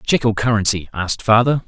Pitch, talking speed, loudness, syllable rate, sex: 110 Hz, 180 wpm, -17 LUFS, 6.0 syllables/s, male